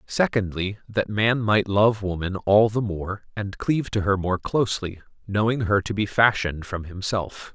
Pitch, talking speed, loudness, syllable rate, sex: 100 Hz, 175 wpm, -23 LUFS, 4.6 syllables/s, male